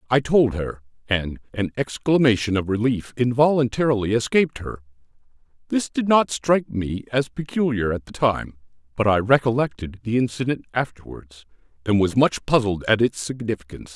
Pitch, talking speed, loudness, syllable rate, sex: 115 Hz, 145 wpm, -22 LUFS, 5.3 syllables/s, male